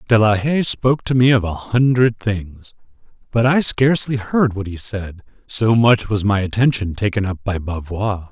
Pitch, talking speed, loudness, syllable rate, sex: 110 Hz, 190 wpm, -17 LUFS, 4.7 syllables/s, male